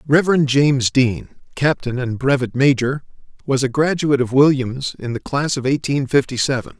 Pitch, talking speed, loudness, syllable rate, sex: 135 Hz, 170 wpm, -18 LUFS, 5.4 syllables/s, male